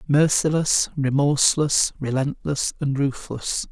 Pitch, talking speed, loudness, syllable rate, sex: 140 Hz, 80 wpm, -21 LUFS, 3.9 syllables/s, male